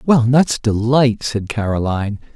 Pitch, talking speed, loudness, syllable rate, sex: 115 Hz, 125 wpm, -17 LUFS, 4.3 syllables/s, male